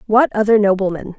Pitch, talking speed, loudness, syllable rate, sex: 210 Hz, 150 wpm, -15 LUFS, 5.8 syllables/s, female